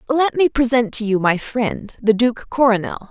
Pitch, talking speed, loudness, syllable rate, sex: 235 Hz, 195 wpm, -18 LUFS, 4.6 syllables/s, female